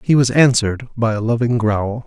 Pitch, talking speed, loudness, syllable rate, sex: 115 Hz, 205 wpm, -16 LUFS, 5.3 syllables/s, male